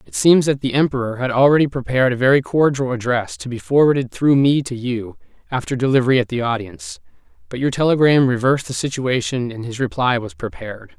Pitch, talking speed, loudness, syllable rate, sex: 130 Hz, 190 wpm, -18 LUFS, 6.1 syllables/s, male